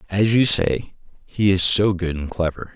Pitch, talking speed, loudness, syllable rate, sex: 95 Hz, 195 wpm, -19 LUFS, 4.4 syllables/s, male